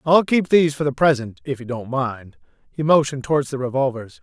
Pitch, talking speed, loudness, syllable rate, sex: 140 Hz, 215 wpm, -20 LUFS, 5.9 syllables/s, male